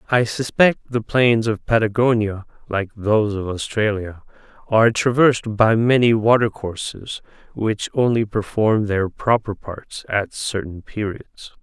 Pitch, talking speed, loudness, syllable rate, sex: 110 Hz, 130 wpm, -19 LUFS, 4.2 syllables/s, male